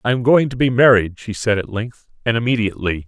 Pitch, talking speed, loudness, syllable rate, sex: 115 Hz, 235 wpm, -17 LUFS, 6.1 syllables/s, male